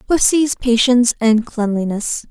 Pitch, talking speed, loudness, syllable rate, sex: 235 Hz, 105 wpm, -15 LUFS, 4.3 syllables/s, female